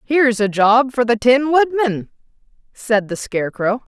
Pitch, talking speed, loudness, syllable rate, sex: 240 Hz, 150 wpm, -16 LUFS, 4.4 syllables/s, female